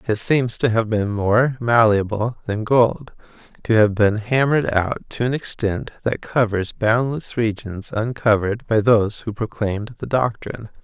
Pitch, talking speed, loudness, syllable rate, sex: 110 Hz, 155 wpm, -20 LUFS, 4.6 syllables/s, male